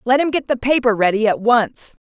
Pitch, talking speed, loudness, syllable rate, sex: 240 Hz, 230 wpm, -17 LUFS, 5.4 syllables/s, female